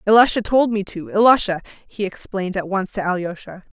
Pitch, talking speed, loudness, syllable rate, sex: 200 Hz, 175 wpm, -19 LUFS, 5.7 syllables/s, female